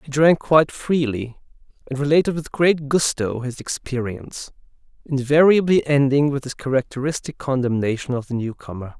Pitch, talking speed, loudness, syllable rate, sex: 135 Hz, 135 wpm, -20 LUFS, 5.2 syllables/s, male